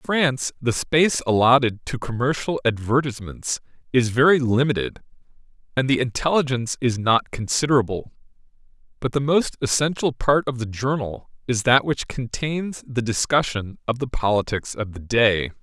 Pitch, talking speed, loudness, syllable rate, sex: 125 Hz, 140 wpm, -22 LUFS, 5.2 syllables/s, male